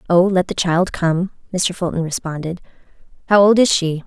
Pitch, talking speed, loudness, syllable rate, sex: 180 Hz, 175 wpm, -17 LUFS, 5.0 syllables/s, female